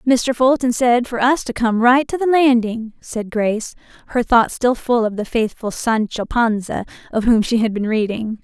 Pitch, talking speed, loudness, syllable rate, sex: 235 Hz, 200 wpm, -18 LUFS, 4.6 syllables/s, female